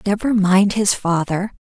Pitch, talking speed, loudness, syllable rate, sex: 195 Hz, 145 wpm, -17 LUFS, 4.1 syllables/s, female